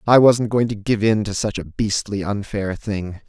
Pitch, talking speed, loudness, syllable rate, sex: 105 Hz, 220 wpm, -20 LUFS, 4.5 syllables/s, male